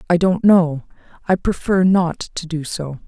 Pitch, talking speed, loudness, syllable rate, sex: 170 Hz, 175 wpm, -18 LUFS, 4.2 syllables/s, female